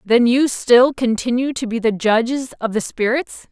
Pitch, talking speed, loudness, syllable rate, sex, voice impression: 240 Hz, 190 wpm, -17 LUFS, 4.5 syllables/s, female, feminine, slightly adult-like, tensed, clear, slightly intellectual, slightly friendly, lively